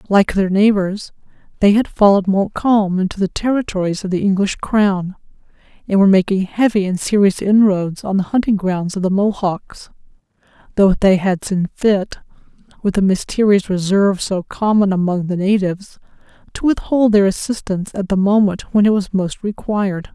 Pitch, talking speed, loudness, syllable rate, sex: 195 Hz, 160 wpm, -16 LUFS, 5.1 syllables/s, female